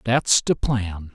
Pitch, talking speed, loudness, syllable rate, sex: 105 Hz, 155 wpm, -21 LUFS, 2.9 syllables/s, male